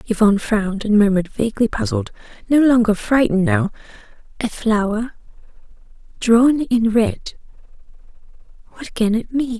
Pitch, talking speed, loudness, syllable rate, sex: 225 Hz, 115 wpm, -18 LUFS, 5.1 syllables/s, female